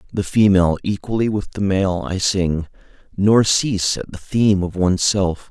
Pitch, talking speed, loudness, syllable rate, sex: 95 Hz, 175 wpm, -18 LUFS, 4.9 syllables/s, male